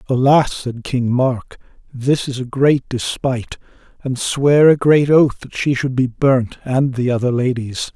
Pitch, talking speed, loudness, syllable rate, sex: 130 Hz, 175 wpm, -17 LUFS, 4.2 syllables/s, male